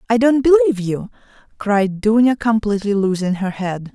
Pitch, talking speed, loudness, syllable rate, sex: 215 Hz, 150 wpm, -17 LUFS, 5.2 syllables/s, female